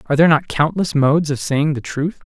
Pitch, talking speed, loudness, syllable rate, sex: 150 Hz, 235 wpm, -17 LUFS, 6.2 syllables/s, male